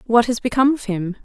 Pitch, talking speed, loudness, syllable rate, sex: 230 Hz, 240 wpm, -19 LUFS, 6.6 syllables/s, female